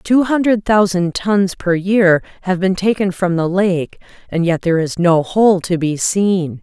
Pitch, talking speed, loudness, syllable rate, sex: 185 Hz, 190 wpm, -15 LUFS, 4.1 syllables/s, female